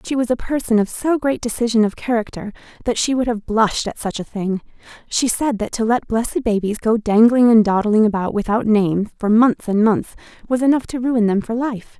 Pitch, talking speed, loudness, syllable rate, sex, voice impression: 225 Hz, 220 wpm, -18 LUFS, 5.4 syllables/s, female, feminine, adult-like, fluent, slightly calm, friendly, slightly sweet, kind